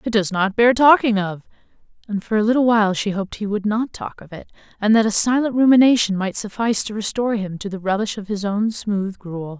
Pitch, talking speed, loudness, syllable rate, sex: 210 Hz, 230 wpm, -19 LUFS, 5.8 syllables/s, female